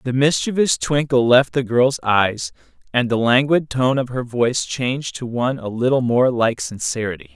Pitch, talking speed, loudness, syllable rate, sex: 125 Hz, 180 wpm, -19 LUFS, 4.9 syllables/s, male